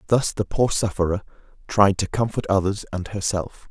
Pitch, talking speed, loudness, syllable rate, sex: 100 Hz, 160 wpm, -22 LUFS, 5.0 syllables/s, male